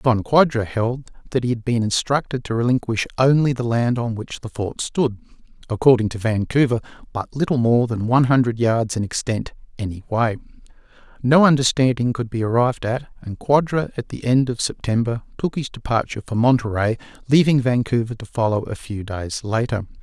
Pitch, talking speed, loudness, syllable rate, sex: 120 Hz, 170 wpm, -20 LUFS, 5.4 syllables/s, male